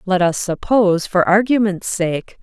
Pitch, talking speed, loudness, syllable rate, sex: 195 Hz, 150 wpm, -17 LUFS, 4.4 syllables/s, female